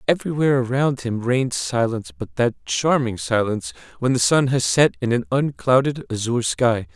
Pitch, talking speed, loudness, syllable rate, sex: 125 Hz, 165 wpm, -20 LUFS, 5.5 syllables/s, male